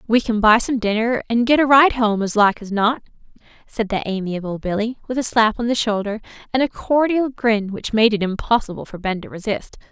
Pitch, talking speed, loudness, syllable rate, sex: 225 Hz, 220 wpm, -19 LUFS, 5.4 syllables/s, female